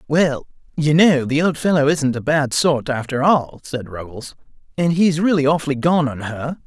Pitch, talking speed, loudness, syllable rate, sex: 145 Hz, 190 wpm, -18 LUFS, 4.7 syllables/s, male